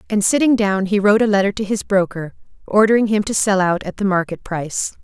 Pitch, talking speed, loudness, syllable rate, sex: 200 Hz, 225 wpm, -17 LUFS, 6.1 syllables/s, female